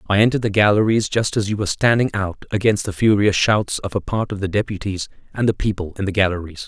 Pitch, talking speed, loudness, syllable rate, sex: 100 Hz, 235 wpm, -19 LUFS, 6.3 syllables/s, male